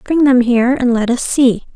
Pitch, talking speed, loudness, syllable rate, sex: 250 Hz, 240 wpm, -13 LUFS, 5.2 syllables/s, female